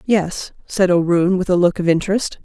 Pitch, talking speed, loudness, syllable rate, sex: 185 Hz, 195 wpm, -17 LUFS, 5.0 syllables/s, female